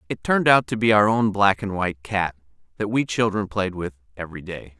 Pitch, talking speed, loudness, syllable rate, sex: 100 Hz, 225 wpm, -21 LUFS, 5.8 syllables/s, male